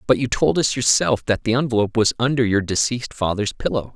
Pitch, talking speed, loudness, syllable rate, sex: 115 Hz, 210 wpm, -20 LUFS, 6.1 syllables/s, male